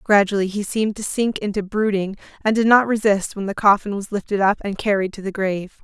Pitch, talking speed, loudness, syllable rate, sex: 205 Hz, 225 wpm, -20 LUFS, 6.0 syllables/s, female